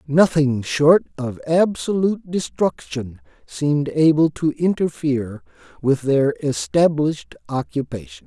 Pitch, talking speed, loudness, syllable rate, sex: 145 Hz, 95 wpm, -20 LUFS, 4.1 syllables/s, male